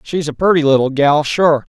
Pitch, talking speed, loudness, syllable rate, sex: 150 Hz, 170 wpm, -14 LUFS, 5.7 syllables/s, male